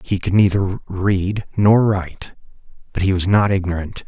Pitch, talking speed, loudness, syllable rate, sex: 95 Hz, 160 wpm, -18 LUFS, 6.3 syllables/s, male